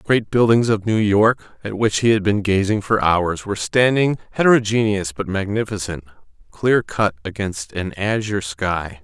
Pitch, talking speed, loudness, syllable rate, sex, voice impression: 100 Hz, 165 wpm, -19 LUFS, 4.8 syllables/s, male, masculine, adult-like, tensed, powerful, slightly bright, soft, raspy, cool, calm, friendly, wild, kind